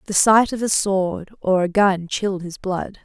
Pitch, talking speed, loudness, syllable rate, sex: 195 Hz, 215 wpm, -19 LUFS, 4.4 syllables/s, female